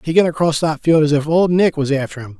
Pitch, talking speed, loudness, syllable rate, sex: 155 Hz, 300 wpm, -16 LUFS, 6.1 syllables/s, male